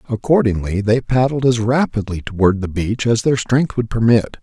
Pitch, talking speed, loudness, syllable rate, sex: 115 Hz, 175 wpm, -17 LUFS, 5.1 syllables/s, male